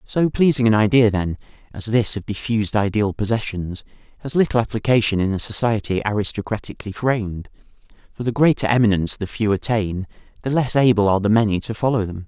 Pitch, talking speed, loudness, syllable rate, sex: 110 Hz, 170 wpm, -20 LUFS, 6.2 syllables/s, male